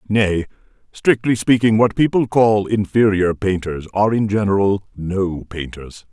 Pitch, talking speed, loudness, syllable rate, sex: 100 Hz, 125 wpm, -17 LUFS, 4.4 syllables/s, male